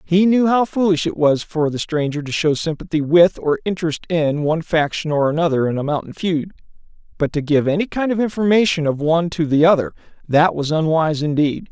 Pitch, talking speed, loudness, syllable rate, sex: 160 Hz, 200 wpm, -18 LUFS, 5.8 syllables/s, male